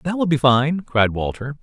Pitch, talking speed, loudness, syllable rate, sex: 140 Hz, 220 wpm, -19 LUFS, 4.7 syllables/s, male